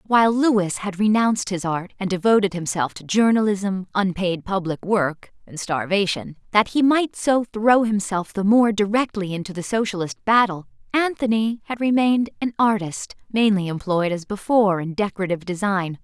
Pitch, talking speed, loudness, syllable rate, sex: 200 Hz, 155 wpm, -21 LUFS, 5.0 syllables/s, female